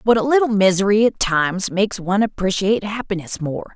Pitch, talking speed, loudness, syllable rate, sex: 200 Hz, 175 wpm, -18 LUFS, 6.0 syllables/s, female